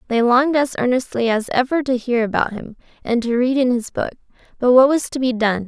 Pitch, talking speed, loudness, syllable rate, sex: 245 Hz, 230 wpm, -18 LUFS, 5.8 syllables/s, female